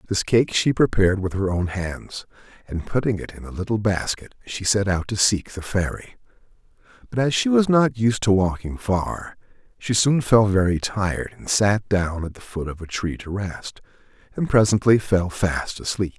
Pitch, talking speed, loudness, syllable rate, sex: 100 Hz, 195 wpm, -22 LUFS, 4.7 syllables/s, male